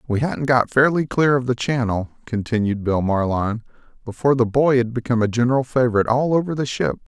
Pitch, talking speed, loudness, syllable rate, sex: 120 Hz, 190 wpm, -20 LUFS, 6.3 syllables/s, male